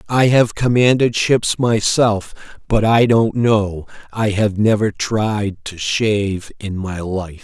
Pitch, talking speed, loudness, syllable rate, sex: 105 Hz, 145 wpm, -17 LUFS, 3.5 syllables/s, male